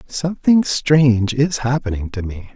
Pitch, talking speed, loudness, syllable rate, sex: 130 Hz, 140 wpm, -17 LUFS, 4.6 syllables/s, male